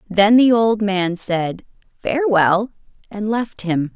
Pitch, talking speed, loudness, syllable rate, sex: 205 Hz, 135 wpm, -17 LUFS, 3.6 syllables/s, female